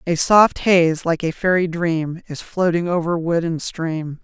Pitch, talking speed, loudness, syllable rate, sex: 170 Hz, 185 wpm, -18 LUFS, 4.0 syllables/s, female